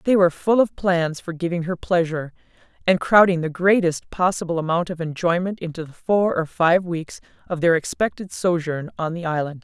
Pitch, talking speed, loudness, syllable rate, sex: 170 Hz, 185 wpm, -21 LUFS, 5.3 syllables/s, female